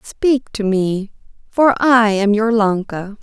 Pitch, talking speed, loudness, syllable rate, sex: 215 Hz, 150 wpm, -16 LUFS, 3.7 syllables/s, female